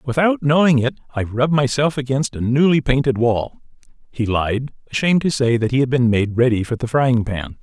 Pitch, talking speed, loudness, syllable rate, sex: 130 Hz, 205 wpm, -18 LUFS, 5.4 syllables/s, male